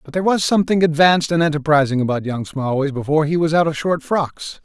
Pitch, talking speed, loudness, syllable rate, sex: 155 Hz, 220 wpm, -18 LUFS, 6.4 syllables/s, male